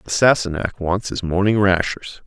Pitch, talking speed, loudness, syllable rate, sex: 95 Hz, 160 wpm, -19 LUFS, 4.5 syllables/s, male